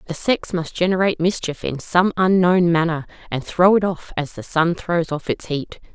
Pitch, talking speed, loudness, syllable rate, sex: 170 Hz, 200 wpm, -20 LUFS, 4.9 syllables/s, female